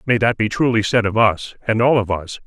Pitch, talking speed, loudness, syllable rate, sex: 110 Hz, 265 wpm, -18 LUFS, 5.5 syllables/s, male